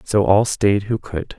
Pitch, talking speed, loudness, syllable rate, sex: 100 Hz, 215 wpm, -18 LUFS, 3.9 syllables/s, male